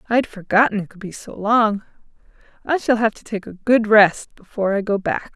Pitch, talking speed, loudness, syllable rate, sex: 210 Hz, 225 wpm, -19 LUFS, 5.6 syllables/s, female